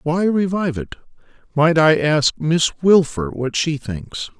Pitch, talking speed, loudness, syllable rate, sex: 150 Hz, 150 wpm, -18 LUFS, 4.0 syllables/s, male